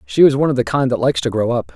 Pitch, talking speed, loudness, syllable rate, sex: 125 Hz, 375 wpm, -16 LUFS, 8.0 syllables/s, male